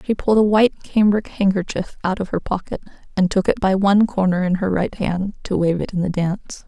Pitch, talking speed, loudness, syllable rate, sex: 190 Hz, 235 wpm, -19 LUFS, 5.8 syllables/s, female